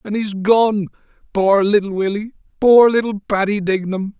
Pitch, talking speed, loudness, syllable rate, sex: 205 Hz, 145 wpm, -16 LUFS, 4.6 syllables/s, male